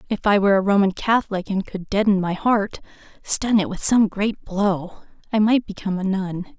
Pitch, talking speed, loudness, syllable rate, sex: 200 Hz, 200 wpm, -20 LUFS, 5.2 syllables/s, female